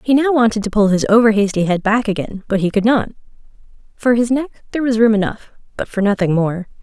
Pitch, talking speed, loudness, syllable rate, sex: 215 Hz, 230 wpm, -16 LUFS, 6.1 syllables/s, female